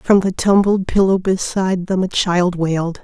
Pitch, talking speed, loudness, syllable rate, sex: 185 Hz, 180 wpm, -16 LUFS, 4.7 syllables/s, female